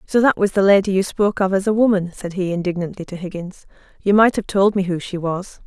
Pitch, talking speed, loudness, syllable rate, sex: 190 Hz, 255 wpm, -19 LUFS, 6.0 syllables/s, female